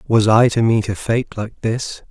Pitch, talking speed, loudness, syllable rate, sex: 110 Hz, 230 wpm, -17 LUFS, 4.2 syllables/s, male